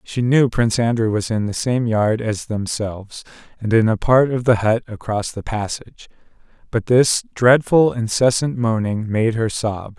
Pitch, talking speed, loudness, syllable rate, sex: 115 Hz, 175 wpm, -18 LUFS, 4.5 syllables/s, male